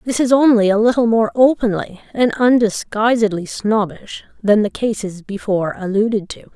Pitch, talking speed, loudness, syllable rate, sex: 220 Hz, 145 wpm, -16 LUFS, 5.0 syllables/s, female